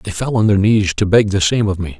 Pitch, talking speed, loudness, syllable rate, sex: 100 Hz, 330 wpm, -15 LUFS, 5.6 syllables/s, male